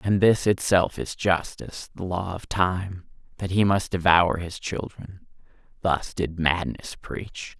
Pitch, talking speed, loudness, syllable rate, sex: 90 Hz, 140 wpm, -24 LUFS, 3.8 syllables/s, male